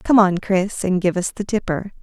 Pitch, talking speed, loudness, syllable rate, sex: 190 Hz, 235 wpm, -20 LUFS, 4.7 syllables/s, female